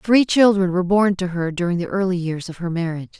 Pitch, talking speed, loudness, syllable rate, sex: 185 Hz, 245 wpm, -19 LUFS, 6.2 syllables/s, female